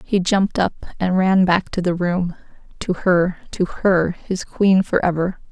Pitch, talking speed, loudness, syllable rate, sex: 180 Hz, 175 wpm, -19 LUFS, 4.2 syllables/s, female